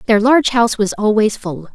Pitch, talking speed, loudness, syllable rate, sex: 220 Hz, 205 wpm, -14 LUFS, 6.0 syllables/s, female